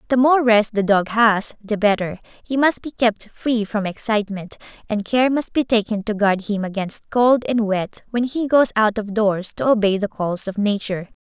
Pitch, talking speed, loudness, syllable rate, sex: 215 Hz, 210 wpm, -19 LUFS, 4.7 syllables/s, female